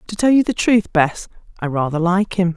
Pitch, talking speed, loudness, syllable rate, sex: 185 Hz, 210 wpm, -17 LUFS, 5.3 syllables/s, female